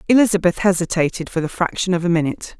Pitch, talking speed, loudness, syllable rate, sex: 180 Hz, 185 wpm, -19 LUFS, 7.1 syllables/s, female